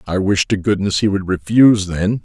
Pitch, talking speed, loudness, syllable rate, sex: 100 Hz, 215 wpm, -16 LUFS, 5.3 syllables/s, male